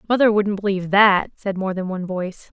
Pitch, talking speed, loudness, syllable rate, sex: 195 Hz, 210 wpm, -19 LUFS, 6.1 syllables/s, female